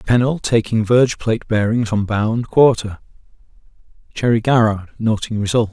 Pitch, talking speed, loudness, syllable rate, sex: 115 Hz, 135 wpm, -17 LUFS, 5.2 syllables/s, male